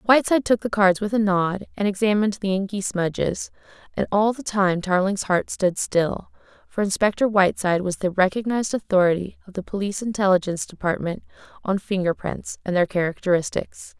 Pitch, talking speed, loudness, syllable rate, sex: 195 Hz, 165 wpm, -22 LUFS, 5.7 syllables/s, female